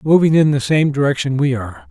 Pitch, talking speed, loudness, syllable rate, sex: 135 Hz, 220 wpm, -16 LUFS, 6.3 syllables/s, male